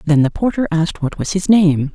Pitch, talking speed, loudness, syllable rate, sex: 170 Hz, 245 wpm, -16 LUFS, 5.6 syllables/s, female